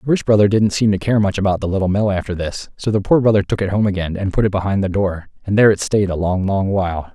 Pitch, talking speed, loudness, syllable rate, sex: 100 Hz, 300 wpm, -17 LUFS, 6.6 syllables/s, male